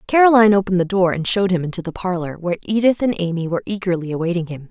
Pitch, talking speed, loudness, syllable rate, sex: 185 Hz, 230 wpm, -18 LUFS, 7.7 syllables/s, female